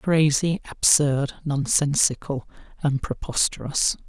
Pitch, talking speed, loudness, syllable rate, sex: 145 Hz, 75 wpm, -22 LUFS, 3.7 syllables/s, male